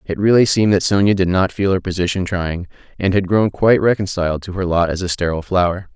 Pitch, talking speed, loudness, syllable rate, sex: 95 Hz, 230 wpm, -17 LUFS, 6.4 syllables/s, male